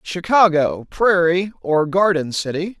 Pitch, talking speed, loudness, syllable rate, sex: 175 Hz, 105 wpm, -17 LUFS, 3.9 syllables/s, male